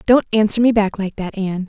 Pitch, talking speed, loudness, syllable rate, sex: 205 Hz, 250 wpm, -17 LUFS, 6.1 syllables/s, female